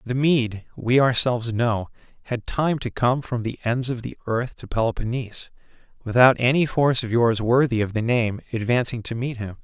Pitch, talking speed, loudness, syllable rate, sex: 120 Hz, 185 wpm, -22 LUFS, 5.2 syllables/s, male